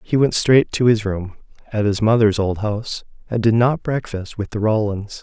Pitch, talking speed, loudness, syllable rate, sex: 110 Hz, 205 wpm, -19 LUFS, 4.9 syllables/s, male